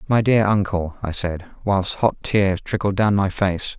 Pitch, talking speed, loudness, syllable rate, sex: 100 Hz, 190 wpm, -20 LUFS, 4.2 syllables/s, male